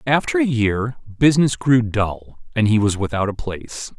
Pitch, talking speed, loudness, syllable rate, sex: 120 Hz, 180 wpm, -19 LUFS, 4.8 syllables/s, male